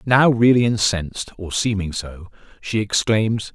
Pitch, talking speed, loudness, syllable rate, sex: 105 Hz, 135 wpm, -19 LUFS, 4.3 syllables/s, male